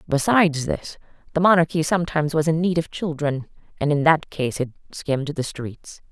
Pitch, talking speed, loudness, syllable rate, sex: 155 Hz, 175 wpm, -22 LUFS, 5.4 syllables/s, female